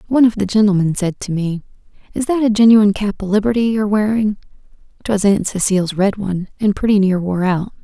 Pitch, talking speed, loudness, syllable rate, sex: 205 Hz, 200 wpm, -16 LUFS, 6.3 syllables/s, female